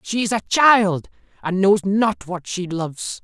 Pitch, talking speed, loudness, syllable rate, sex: 180 Hz, 185 wpm, -19 LUFS, 3.9 syllables/s, male